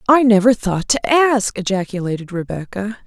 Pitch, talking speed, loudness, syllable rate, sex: 210 Hz, 135 wpm, -17 LUFS, 5.0 syllables/s, female